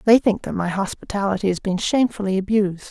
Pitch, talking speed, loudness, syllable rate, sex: 200 Hz, 185 wpm, -21 LUFS, 6.6 syllables/s, female